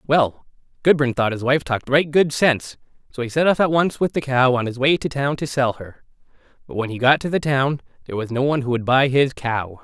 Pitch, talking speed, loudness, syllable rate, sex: 135 Hz, 255 wpm, -20 LUFS, 5.8 syllables/s, male